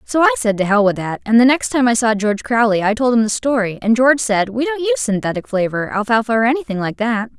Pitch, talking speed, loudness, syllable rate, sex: 235 Hz, 270 wpm, -16 LUFS, 6.3 syllables/s, female